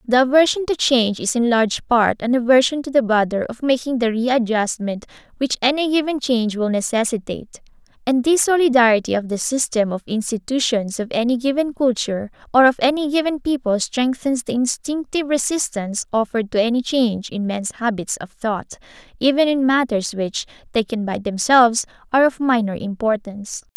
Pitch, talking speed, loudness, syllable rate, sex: 245 Hz, 160 wpm, -19 LUFS, 5.5 syllables/s, female